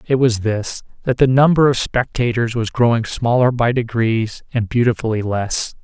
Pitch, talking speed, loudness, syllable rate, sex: 120 Hz, 155 wpm, -17 LUFS, 4.7 syllables/s, male